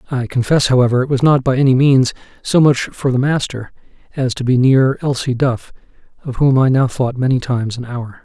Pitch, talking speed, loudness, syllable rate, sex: 130 Hz, 210 wpm, -15 LUFS, 5.5 syllables/s, male